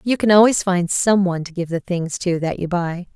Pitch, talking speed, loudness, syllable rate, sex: 185 Hz, 265 wpm, -18 LUFS, 5.3 syllables/s, female